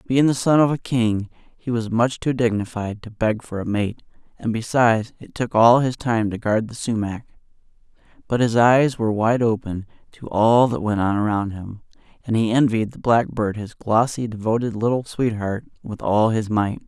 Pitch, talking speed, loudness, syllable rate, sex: 115 Hz, 190 wpm, -21 LUFS, 4.8 syllables/s, male